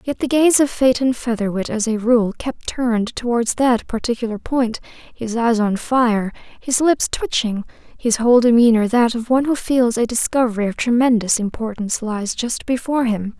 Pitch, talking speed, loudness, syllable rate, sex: 235 Hz, 175 wpm, -18 LUFS, 5.0 syllables/s, female